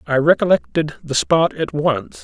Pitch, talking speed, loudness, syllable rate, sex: 155 Hz, 160 wpm, -18 LUFS, 4.5 syllables/s, male